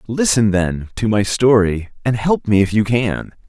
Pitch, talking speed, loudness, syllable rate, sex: 110 Hz, 190 wpm, -16 LUFS, 4.3 syllables/s, male